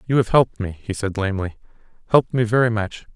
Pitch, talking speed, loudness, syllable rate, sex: 110 Hz, 190 wpm, -21 LUFS, 6.8 syllables/s, male